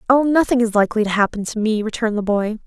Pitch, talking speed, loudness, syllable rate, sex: 220 Hz, 250 wpm, -18 LUFS, 7.0 syllables/s, female